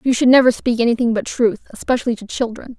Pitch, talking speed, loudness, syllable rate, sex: 240 Hz, 215 wpm, -17 LUFS, 6.4 syllables/s, female